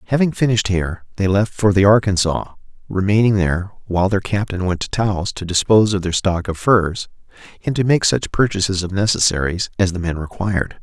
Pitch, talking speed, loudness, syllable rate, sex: 95 Hz, 190 wpm, -18 LUFS, 5.8 syllables/s, male